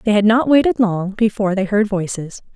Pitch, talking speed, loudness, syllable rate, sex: 205 Hz, 210 wpm, -16 LUFS, 5.6 syllables/s, female